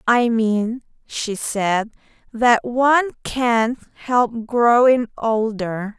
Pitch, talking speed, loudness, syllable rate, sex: 230 Hz, 100 wpm, -19 LUFS, 2.7 syllables/s, female